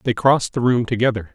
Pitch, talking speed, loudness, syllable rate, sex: 120 Hz, 225 wpm, -18 LUFS, 6.6 syllables/s, male